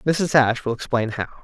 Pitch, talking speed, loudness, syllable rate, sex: 130 Hz, 210 wpm, -21 LUFS, 5.6 syllables/s, male